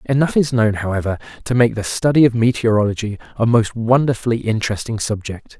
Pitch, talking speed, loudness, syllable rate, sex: 115 Hz, 160 wpm, -18 LUFS, 5.9 syllables/s, male